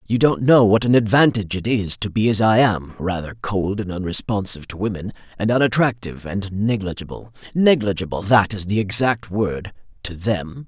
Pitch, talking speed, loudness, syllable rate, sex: 105 Hz, 165 wpm, -19 LUFS, 5.3 syllables/s, male